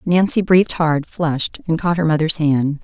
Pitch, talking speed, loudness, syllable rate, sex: 160 Hz, 190 wpm, -17 LUFS, 4.9 syllables/s, female